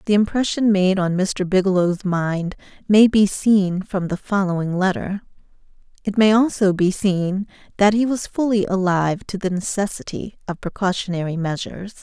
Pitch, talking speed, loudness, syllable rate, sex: 195 Hz, 150 wpm, -20 LUFS, 4.9 syllables/s, female